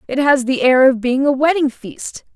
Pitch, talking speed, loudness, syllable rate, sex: 275 Hz, 230 wpm, -15 LUFS, 4.7 syllables/s, female